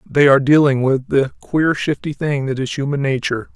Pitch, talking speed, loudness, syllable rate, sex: 140 Hz, 205 wpm, -17 LUFS, 5.6 syllables/s, male